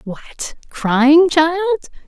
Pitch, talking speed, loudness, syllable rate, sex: 295 Hz, 85 wpm, -14 LUFS, 2.5 syllables/s, female